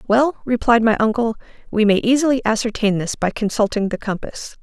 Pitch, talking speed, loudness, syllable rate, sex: 225 Hz, 170 wpm, -18 LUFS, 5.5 syllables/s, female